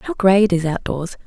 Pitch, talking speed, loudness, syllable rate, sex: 190 Hz, 235 wpm, -18 LUFS, 5.1 syllables/s, female